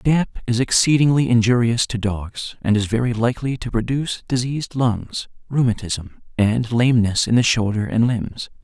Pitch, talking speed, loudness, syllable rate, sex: 120 Hz, 155 wpm, -19 LUFS, 4.9 syllables/s, male